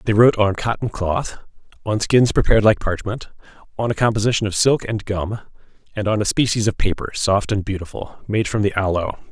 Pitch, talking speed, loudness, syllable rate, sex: 105 Hz, 195 wpm, -19 LUFS, 5.6 syllables/s, male